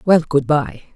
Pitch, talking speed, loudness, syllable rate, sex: 150 Hz, 190 wpm, -17 LUFS, 4.0 syllables/s, female